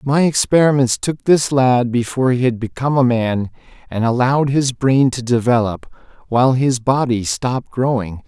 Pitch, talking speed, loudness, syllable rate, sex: 125 Hz, 160 wpm, -16 LUFS, 5.0 syllables/s, male